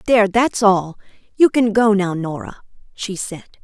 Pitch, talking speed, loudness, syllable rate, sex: 205 Hz, 165 wpm, -17 LUFS, 4.7 syllables/s, female